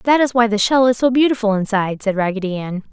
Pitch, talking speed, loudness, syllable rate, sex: 220 Hz, 245 wpm, -17 LUFS, 6.4 syllables/s, female